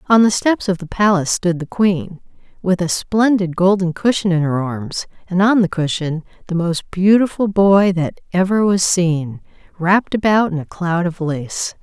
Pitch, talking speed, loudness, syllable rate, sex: 180 Hz, 185 wpm, -17 LUFS, 4.6 syllables/s, female